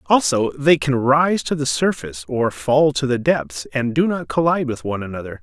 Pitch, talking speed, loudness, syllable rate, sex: 130 Hz, 210 wpm, -19 LUFS, 5.2 syllables/s, male